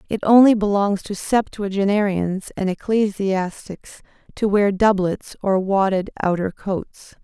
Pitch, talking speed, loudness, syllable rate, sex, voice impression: 195 Hz, 115 wpm, -20 LUFS, 4.1 syllables/s, female, feminine, adult-like, sincere, slightly calm, elegant, slightly sweet